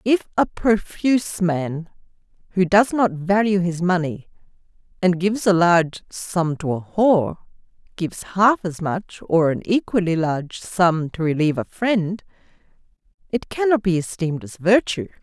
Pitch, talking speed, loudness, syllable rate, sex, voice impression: 185 Hz, 145 wpm, -20 LUFS, 4.6 syllables/s, female, very feminine, very middle-aged, slightly thick, tensed, powerful, bright, soft, clear, fluent, slightly raspy, cool, intellectual, refreshing, slightly sincere, calm, friendly, reassuring, very unique, elegant, wild, slightly sweet, very lively, kind, slightly intense